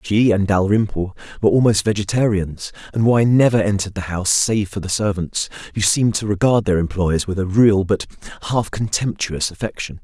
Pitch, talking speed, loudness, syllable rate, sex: 100 Hz, 175 wpm, -18 LUFS, 5.4 syllables/s, male